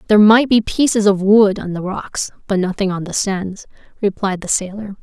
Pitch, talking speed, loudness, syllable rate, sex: 200 Hz, 205 wpm, -16 LUFS, 5.1 syllables/s, female